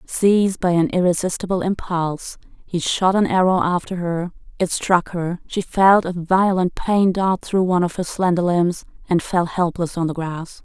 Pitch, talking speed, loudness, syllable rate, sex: 180 Hz, 180 wpm, -19 LUFS, 4.6 syllables/s, female